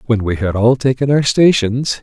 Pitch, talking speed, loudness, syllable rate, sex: 120 Hz, 205 wpm, -14 LUFS, 4.8 syllables/s, male